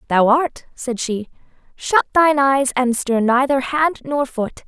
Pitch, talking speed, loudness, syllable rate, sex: 265 Hz, 165 wpm, -18 LUFS, 4.0 syllables/s, female